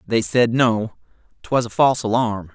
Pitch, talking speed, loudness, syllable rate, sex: 115 Hz, 165 wpm, -19 LUFS, 4.6 syllables/s, male